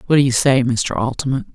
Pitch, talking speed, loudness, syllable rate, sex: 130 Hz, 235 wpm, -17 LUFS, 5.9 syllables/s, female